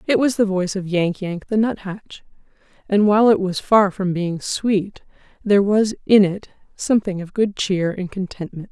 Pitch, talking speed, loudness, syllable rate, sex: 195 Hz, 185 wpm, -19 LUFS, 4.9 syllables/s, female